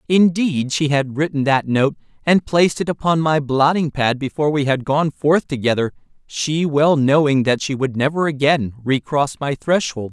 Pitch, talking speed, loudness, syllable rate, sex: 145 Hz, 185 wpm, -18 LUFS, 4.8 syllables/s, male